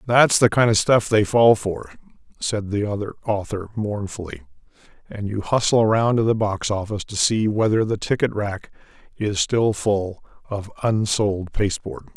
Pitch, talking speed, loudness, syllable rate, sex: 105 Hz, 165 wpm, -21 LUFS, 4.7 syllables/s, male